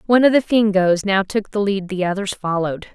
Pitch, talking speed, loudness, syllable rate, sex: 200 Hz, 225 wpm, -18 LUFS, 5.9 syllables/s, female